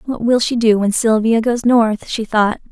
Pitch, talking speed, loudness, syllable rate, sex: 225 Hz, 220 wpm, -15 LUFS, 4.4 syllables/s, female